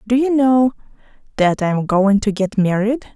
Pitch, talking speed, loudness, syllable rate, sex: 220 Hz, 190 wpm, -16 LUFS, 4.8 syllables/s, female